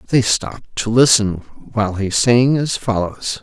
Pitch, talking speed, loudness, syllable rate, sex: 110 Hz, 160 wpm, -17 LUFS, 4.7 syllables/s, male